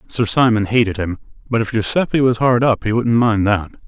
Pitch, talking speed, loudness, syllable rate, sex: 115 Hz, 215 wpm, -16 LUFS, 5.5 syllables/s, male